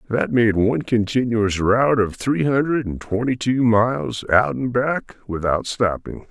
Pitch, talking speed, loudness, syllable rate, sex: 115 Hz, 160 wpm, -20 LUFS, 4.4 syllables/s, male